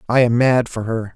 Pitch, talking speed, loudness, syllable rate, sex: 115 Hz, 260 wpm, -17 LUFS, 5.2 syllables/s, male